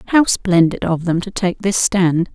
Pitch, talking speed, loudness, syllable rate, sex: 185 Hz, 205 wpm, -16 LUFS, 3.9 syllables/s, female